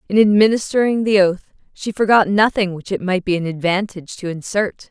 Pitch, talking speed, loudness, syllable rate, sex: 195 Hz, 185 wpm, -17 LUFS, 5.5 syllables/s, female